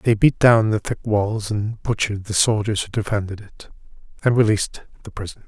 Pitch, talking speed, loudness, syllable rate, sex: 105 Hz, 185 wpm, -20 LUFS, 5.5 syllables/s, male